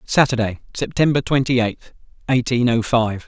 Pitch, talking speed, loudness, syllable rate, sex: 120 Hz, 130 wpm, -19 LUFS, 4.8 syllables/s, male